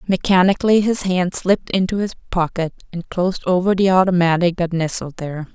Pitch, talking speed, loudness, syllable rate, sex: 180 Hz, 160 wpm, -18 LUFS, 5.7 syllables/s, female